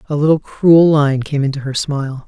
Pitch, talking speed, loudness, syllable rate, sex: 145 Hz, 210 wpm, -14 LUFS, 5.2 syllables/s, male